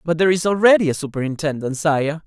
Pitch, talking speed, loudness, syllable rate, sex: 160 Hz, 185 wpm, -18 LUFS, 6.5 syllables/s, male